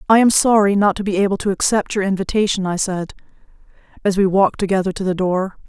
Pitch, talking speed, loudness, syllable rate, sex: 195 Hz, 210 wpm, -17 LUFS, 6.4 syllables/s, female